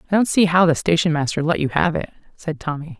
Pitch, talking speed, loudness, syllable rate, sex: 165 Hz, 260 wpm, -19 LUFS, 6.3 syllables/s, female